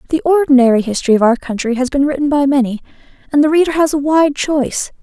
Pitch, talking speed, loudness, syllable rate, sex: 280 Hz, 215 wpm, -14 LUFS, 6.6 syllables/s, female